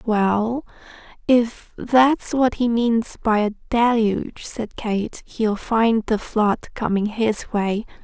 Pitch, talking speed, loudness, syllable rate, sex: 225 Hz, 135 wpm, -21 LUFS, 3.1 syllables/s, female